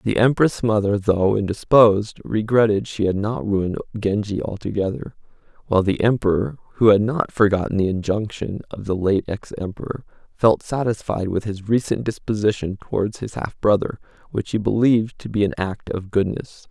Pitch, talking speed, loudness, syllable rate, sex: 105 Hz, 160 wpm, -21 LUFS, 5.2 syllables/s, male